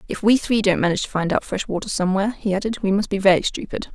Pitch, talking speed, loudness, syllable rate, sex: 200 Hz, 275 wpm, -21 LUFS, 7.2 syllables/s, female